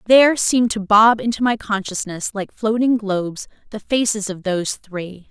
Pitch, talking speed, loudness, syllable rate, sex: 210 Hz, 170 wpm, -18 LUFS, 4.9 syllables/s, female